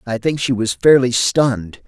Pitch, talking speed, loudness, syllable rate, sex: 125 Hz, 190 wpm, -16 LUFS, 4.6 syllables/s, male